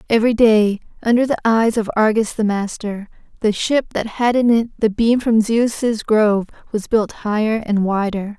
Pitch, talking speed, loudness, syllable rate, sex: 220 Hz, 180 wpm, -17 LUFS, 4.6 syllables/s, female